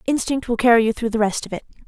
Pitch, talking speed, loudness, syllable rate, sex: 230 Hz, 290 wpm, -19 LUFS, 7.1 syllables/s, female